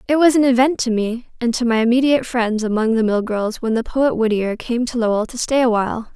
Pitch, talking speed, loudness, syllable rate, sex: 235 Hz, 245 wpm, -18 LUFS, 5.8 syllables/s, female